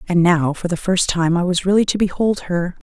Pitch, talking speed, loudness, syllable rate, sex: 180 Hz, 245 wpm, -18 LUFS, 5.3 syllables/s, female